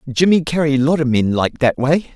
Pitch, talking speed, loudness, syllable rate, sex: 145 Hz, 225 wpm, -16 LUFS, 5.1 syllables/s, male